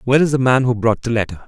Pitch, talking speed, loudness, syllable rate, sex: 120 Hz, 325 wpm, -16 LUFS, 7.4 syllables/s, male